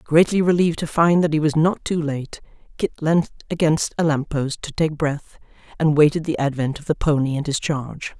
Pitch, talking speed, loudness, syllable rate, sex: 155 Hz, 210 wpm, -20 LUFS, 5.3 syllables/s, female